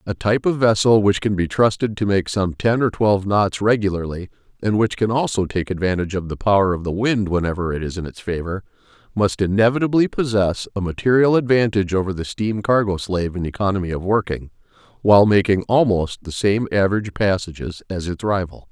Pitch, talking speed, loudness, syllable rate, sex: 100 Hz, 190 wpm, -19 LUFS, 5.9 syllables/s, male